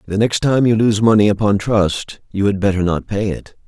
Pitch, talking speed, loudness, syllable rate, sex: 105 Hz, 230 wpm, -16 LUFS, 5.0 syllables/s, male